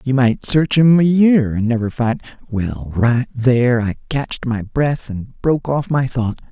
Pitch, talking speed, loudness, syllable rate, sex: 125 Hz, 185 wpm, -17 LUFS, 4.3 syllables/s, male